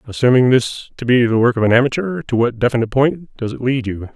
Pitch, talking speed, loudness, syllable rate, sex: 125 Hz, 245 wpm, -16 LUFS, 6.1 syllables/s, male